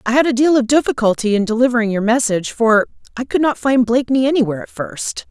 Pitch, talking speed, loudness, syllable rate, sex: 240 Hz, 215 wpm, -16 LUFS, 6.5 syllables/s, female